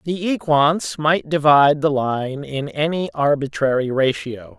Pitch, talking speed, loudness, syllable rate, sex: 145 Hz, 130 wpm, -19 LUFS, 4.1 syllables/s, male